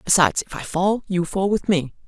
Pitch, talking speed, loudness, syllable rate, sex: 180 Hz, 230 wpm, -21 LUFS, 5.4 syllables/s, male